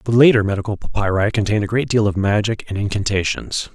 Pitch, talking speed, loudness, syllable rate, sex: 105 Hz, 190 wpm, -18 LUFS, 6.1 syllables/s, male